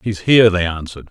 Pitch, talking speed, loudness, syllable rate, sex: 95 Hz, 220 wpm, -14 LUFS, 6.5 syllables/s, male